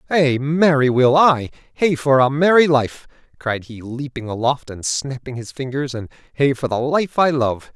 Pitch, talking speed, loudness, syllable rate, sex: 135 Hz, 185 wpm, -18 LUFS, 4.4 syllables/s, male